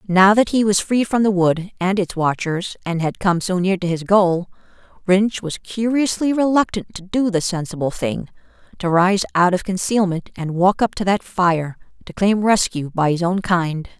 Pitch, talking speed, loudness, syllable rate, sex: 190 Hz, 195 wpm, -19 LUFS, 4.6 syllables/s, female